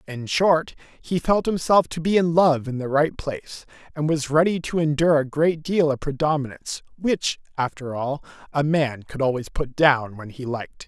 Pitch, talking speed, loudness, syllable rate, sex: 150 Hz, 195 wpm, -22 LUFS, 4.9 syllables/s, male